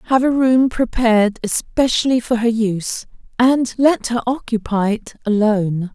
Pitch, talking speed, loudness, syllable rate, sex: 230 Hz, 140 wpm, -17 LUFS, 4.6 syllables/s, female